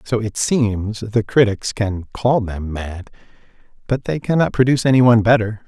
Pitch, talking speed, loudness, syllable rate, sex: 110 Hz, 170 wpm, -18 LUFS, 4.8 syllables/s, male